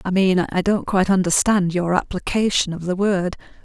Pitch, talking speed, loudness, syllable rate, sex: 185 Hz, 180 wpm, -19 LUFS, 5.2 syllables/s, female